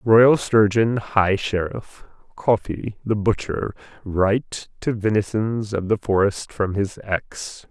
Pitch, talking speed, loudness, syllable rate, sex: 105 Hz, 125 wpm, -21 LUFS, 3.4 syllables/s, male